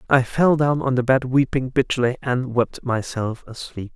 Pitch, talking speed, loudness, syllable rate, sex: 125 Hz, 180 wpm, -21 LUFS, 4.6 syllables/s, male